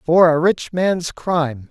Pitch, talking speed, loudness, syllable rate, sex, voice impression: 165 Hz, 175 wpm, -17 LUFS, 3.8 syllables/s, male, masculine, middle-aged, slightly relaxed, powerful, hard, clear, raspy, cool, mature, friendly, wild, lively, strict, intense, slightly sharp